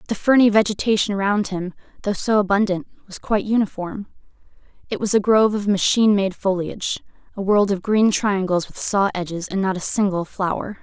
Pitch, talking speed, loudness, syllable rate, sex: 200 Hz, 170 wpm, -20 LUFS, 5.6 syllables/s, female